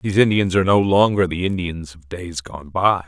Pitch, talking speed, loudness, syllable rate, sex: 90 Hz, 215 wpm, -18 LUFS, 5.4 syllables/s, male